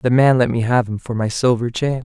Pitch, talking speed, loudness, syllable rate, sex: 120 Hz, 285 wpm, -18 LUFS, 5.5 syllables/s, male